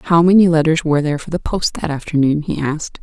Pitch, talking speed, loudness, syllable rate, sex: 160 Hz, 240 wpm, -16 LUFS, 6.4 syllables/s, female